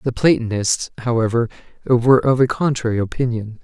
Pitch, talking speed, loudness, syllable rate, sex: 120 Hz, 130 wpm, -18 LUFS, 5.6 syllables/s, male